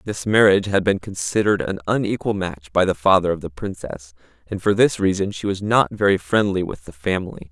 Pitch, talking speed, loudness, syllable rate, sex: 95 Hz, 210 wpm, -20 LUFS, 5.8 syllables/s, male